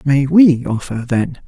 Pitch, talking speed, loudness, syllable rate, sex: 140 Hz, 165 wpm, -14 LUFS, 3.9 syllables/s, male